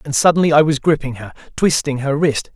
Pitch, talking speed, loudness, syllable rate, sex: 145 Hz, 210 wpm, -16 LUFS, 5.9 syllables/s, male